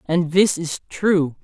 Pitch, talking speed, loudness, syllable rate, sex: 170 Hz, 170 wpm, -19 LUFS, 3.3 syllables/s, male